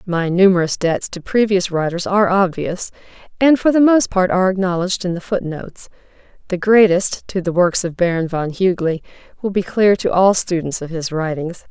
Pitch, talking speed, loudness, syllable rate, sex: 180 Hz, 185 wpm, -17 LUFS, 5.4 syllables/s, female